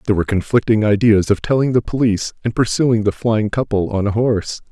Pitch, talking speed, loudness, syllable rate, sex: 110 Hz, 205 wpm, -17 LUFS, 6.2 syllables/s, male